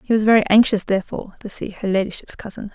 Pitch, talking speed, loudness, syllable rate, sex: 205 Hz, 220 wpm, -19 LUFS, 6.9 syllables/s, female